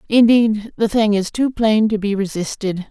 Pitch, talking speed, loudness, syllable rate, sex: 215 Hz, 185 wpm, -17 LUFS, 4.6 syllables/s, female